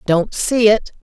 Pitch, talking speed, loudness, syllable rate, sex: 210 Hz, 165 wpm, -16 LUFS, 3.7 syllables/s, female